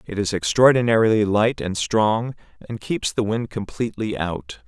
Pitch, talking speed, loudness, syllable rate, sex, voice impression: 105 Hz, 155 wpm, -21 LUFS, 4.7 syllables/s, male, very masculine, very adult-like, very middle-aged, very thick, slightly tensed, powerful, slightly bright, slightly soft, clear, fluent, slightly raspy, very cool, very intellectual, refreshing, very sincere, very calm, very mature, friendly, reassuring, very unique, elegant, very wild, very sweet, slightly lively, very kind, slightly modest